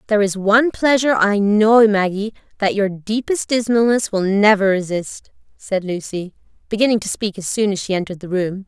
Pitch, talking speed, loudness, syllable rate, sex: 205 Hz, 180 wpm, -17 LUFS, 5.4 syllables/s, female